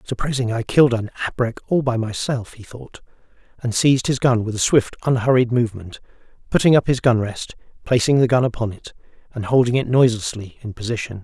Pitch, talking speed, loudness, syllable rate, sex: 120 Hz, 185 wpm, -19 LUFS, 6.0 syllables/s, male